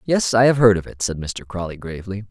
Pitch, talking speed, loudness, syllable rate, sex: 105 Hz, 260 wpm, -19 LUFS, 6.3 syllables/s, male